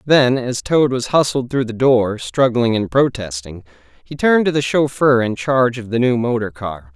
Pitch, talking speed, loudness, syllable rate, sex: 120 Hz, 200 wpm, -17 LUFS, 4.8 syllables/s, male